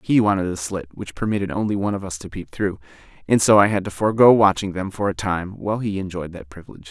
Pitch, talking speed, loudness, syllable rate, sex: 95 Hz, 250 wpm, -20 LUFS, 6.7 syllables/s, male